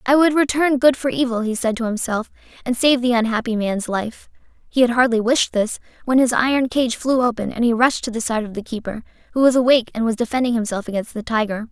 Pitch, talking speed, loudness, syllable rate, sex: 240 Hz, 235 wpm, -19 LUFS, 6.0 syllables/s, female